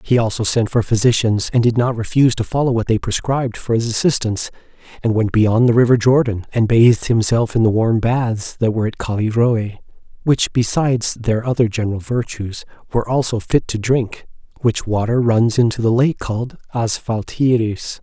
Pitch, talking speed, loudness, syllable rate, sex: 115 Hz, 175 wpm, -17 LUFS, 5.4 syllables/s, male